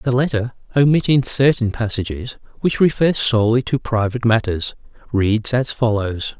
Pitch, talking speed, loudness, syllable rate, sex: 120 Hz, 130 wpm, -18 LUFS, 4.9 syllables/s, male